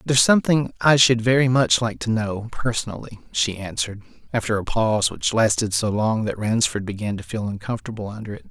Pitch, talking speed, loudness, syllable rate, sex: 110 Hz, 185 wpm, -21 LUFS, 5.8 syllables/s, male